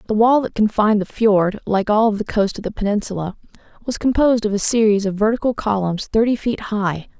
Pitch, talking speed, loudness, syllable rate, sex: 210 Hz, 200 wpm, -18 LUFS, 5.7 syllables/s, female